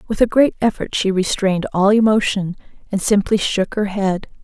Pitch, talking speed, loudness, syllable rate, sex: 200 Hz, 175 wpm, -17 LUFS, 5.1 syllables/s, female